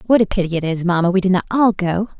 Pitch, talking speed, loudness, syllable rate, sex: 190 Hz, 300 wpm, -17 LUFS, 6.8 syllables/s, female